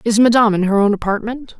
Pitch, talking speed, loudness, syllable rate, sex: 220 Hz, 225 wpm, -15 LUFS, 6.7 syllables/s, female